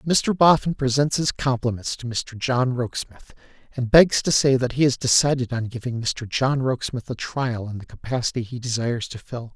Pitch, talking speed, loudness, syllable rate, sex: 125 Hz, 195 wpm, -22 LUFS, 5.1 syllables/s, male